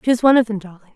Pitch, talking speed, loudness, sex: 220 Hz, 315 wpm, -16 LUFS, female